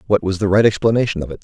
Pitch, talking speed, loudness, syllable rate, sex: 100 Hz, 295 wpm, -16 LUFS, 7.9 syllables/s, male